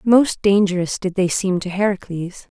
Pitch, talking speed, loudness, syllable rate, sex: 190 Hz, 160 wpm, -19 LUFS, 4.6 syllables/s, female